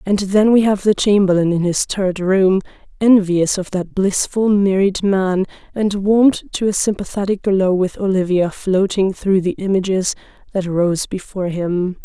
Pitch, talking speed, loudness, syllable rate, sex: 190 Hz, 160 wpm, -17 LUFS, 4.5 syllables/s, female